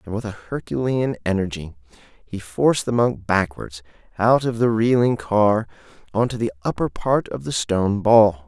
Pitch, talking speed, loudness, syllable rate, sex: 105 Hz, 170 wpm, -20 LUFS, 4.7 syllables/s, male